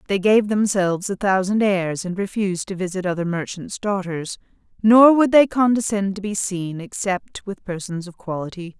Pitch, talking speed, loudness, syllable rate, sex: 195 Hz, 170 wpm, -20 LUFS, 4.9 syllables/s, female